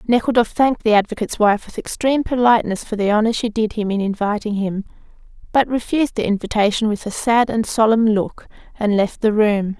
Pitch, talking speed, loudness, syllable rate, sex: 220 Hz, 190 wpm, -18 LUFS, 5.9 syllables/s, female